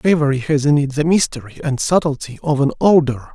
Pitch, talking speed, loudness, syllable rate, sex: 145 Hz, 195 wpm, -17 LUFS, 5.9 syllables/s, male